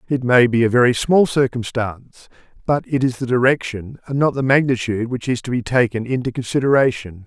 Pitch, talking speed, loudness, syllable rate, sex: 125 Hz, 190 wpm, -18 LUFS, 5.8 syllables/s, male